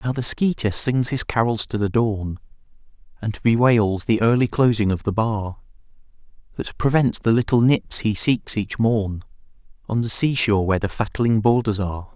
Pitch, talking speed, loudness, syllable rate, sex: 110 Hz, 175 wpm, -20 LUFS, 4.9 syllables/s, male